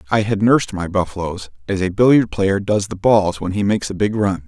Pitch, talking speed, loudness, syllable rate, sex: 100 Hz, 240 wpm, -18 LUFS, 5.6 syllables/s, male